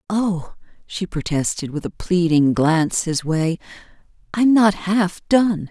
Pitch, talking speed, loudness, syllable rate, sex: 180 Hz, 135 wpm, -19 LUFS, 3.8 syllables/s, female